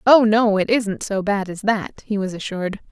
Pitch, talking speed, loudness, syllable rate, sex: 205 Hz, 225 wpm, -20 LUFS, 4.9 syllables/s, female